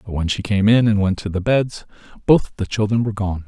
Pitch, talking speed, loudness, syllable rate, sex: 105 Hz, 260 wpm, -19 LUFS, 5.9 syllables/s, male